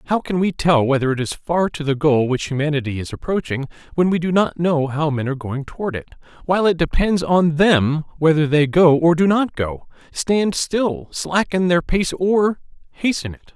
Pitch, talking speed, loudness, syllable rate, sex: 160 Hz, 205 wpm, -19 LUFS, 5.0 syllables/s, male